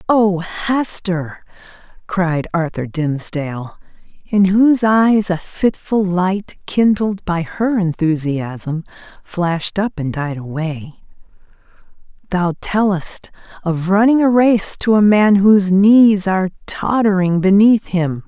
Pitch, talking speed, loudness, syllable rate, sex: 190 Hz, 115 wpm, -16 LUFS, 3.7 syllables/s, female